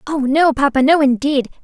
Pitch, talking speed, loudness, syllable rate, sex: 280 Hz, 185 wpm, -15 LUFS, 5.2 syllables/s, female